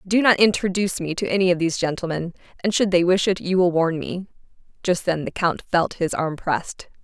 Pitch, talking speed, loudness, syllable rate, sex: 180 Hz, 220 wpm, -21 LUFS, 5.8 syllables/s, female